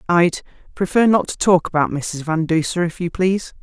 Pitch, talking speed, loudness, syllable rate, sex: 170 Hz, 180 wpm, -18 LUFS, 5.3 syllables/s, female